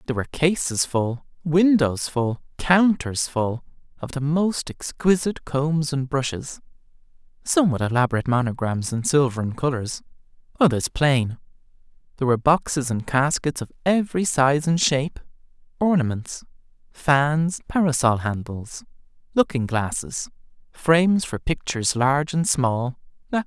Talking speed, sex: 125 wpm, male